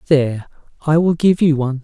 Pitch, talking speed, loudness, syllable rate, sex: 150 Hz, 195 wpm, -16 LUFS, 6.5 syllables/s, male